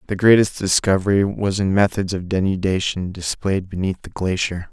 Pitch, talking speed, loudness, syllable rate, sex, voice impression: 95 Hz, 155 wpm, -19 LUFS, 5.1 syllables/s, male, masculine, adult-like, slightly dark, slightly sincere, calm